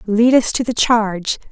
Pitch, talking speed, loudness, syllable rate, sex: 220 Hz, 200 wpm, -15 LUFS, 4.7 syllables/s, female